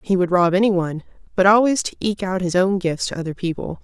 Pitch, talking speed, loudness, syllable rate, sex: 185 Hz, 235 wpm, -19 LUFS, 6.6 syllables/s, female